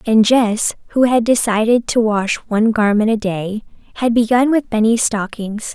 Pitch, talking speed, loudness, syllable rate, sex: 225 Hz, 165 wpm, -16 LUFS, 4.5 syllables/s, female